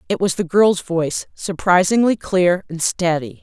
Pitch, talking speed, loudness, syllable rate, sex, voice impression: 180 Hz, 160 wpm, -18 LUFS, 4.4 syllables/s, female, feminine, middle-aged, tensed, powerful, clear, fluent, intellectual, reassuring, slightly wild, lively, slightly strict, intense, slightly sharp